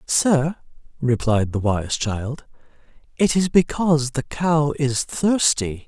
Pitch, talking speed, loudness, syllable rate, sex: 135 Hz, 120 wpm, -20 LUFS, 3.5 syllables/s, male